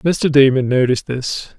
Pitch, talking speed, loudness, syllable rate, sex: 135 Hz, 150 wpm, -16 LUFS, 4.5 syllables/s, male